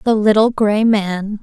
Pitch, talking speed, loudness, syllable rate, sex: 210 Hz, 170 wpm, -15 LUFS, 3.8 syllables/s, female